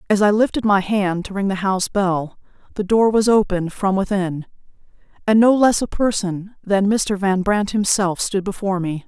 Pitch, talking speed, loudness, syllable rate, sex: 200 Hz, 190 wpm, -18 LUFS, 5.0 syllables/s, female